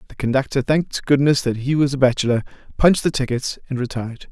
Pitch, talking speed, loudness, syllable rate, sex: 135 Hz, 195 wpm, -19 LUFS, 6.6 syllables/s, male